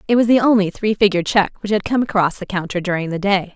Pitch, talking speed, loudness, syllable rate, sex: 200 Hz, 270 wpm, -17 LUFS, 7.0 syllables/s, female